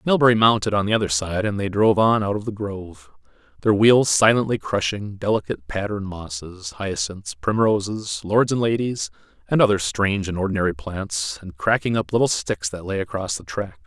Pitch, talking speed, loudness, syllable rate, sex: 100 Hz, 180 wpm, -21 LUFS, 5.4 syllables/s, male